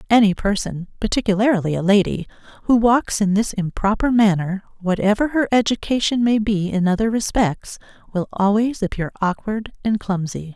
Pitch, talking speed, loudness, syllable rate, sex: 210 Hz, 140 wpm, -19 LUFS, 5.1 syllables/s, female